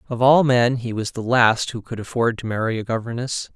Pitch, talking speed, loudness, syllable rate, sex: 115 Hz, 235 wpm, -20 LUFS, 5.3 syllables/s, male